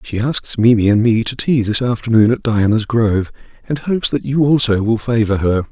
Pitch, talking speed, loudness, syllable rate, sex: 115 Hz, 210 wpm, -15 LUFS, 5.3 syllables/s, male